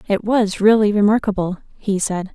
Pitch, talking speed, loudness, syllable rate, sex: 205 Hz, 155 wpm, -18 LUFS, 5.0 syllables/s, female